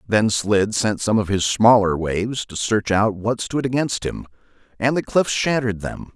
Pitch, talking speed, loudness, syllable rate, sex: 110 Hz, 195 wpm, -20 LUFS, 4.6 syllables/s, male